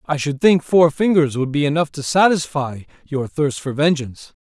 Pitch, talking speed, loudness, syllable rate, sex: 150 Hz, 190 wpm, -18 LUFS, 4.9 syllables/s, male